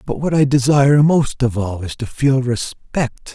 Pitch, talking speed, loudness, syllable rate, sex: 130 Hz, 195 wpm, -17 LUFS, 4.3 syllables/s, male